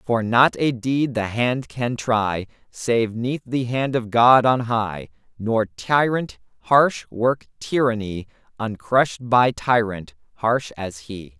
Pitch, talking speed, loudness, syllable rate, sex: 115 Hz, 140 wpm, -21 LUFS, 3.3 syllables/s, male